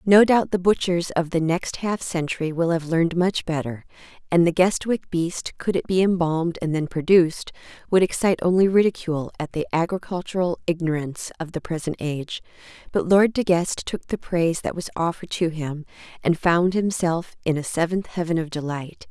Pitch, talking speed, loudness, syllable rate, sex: 170 Hz, 180 wpm, -22 LUFS, 5.4 syllables/s, female